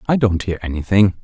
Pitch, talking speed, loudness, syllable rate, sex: 100 Hz, 195 wpm, -18 LUFS, 5.5 syllables/s, male